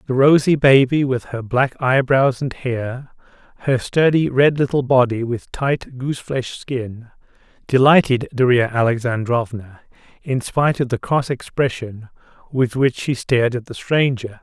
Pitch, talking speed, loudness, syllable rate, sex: 125 Hz, 145 wpm, -18 LUFS, 4.4 syllables/s, male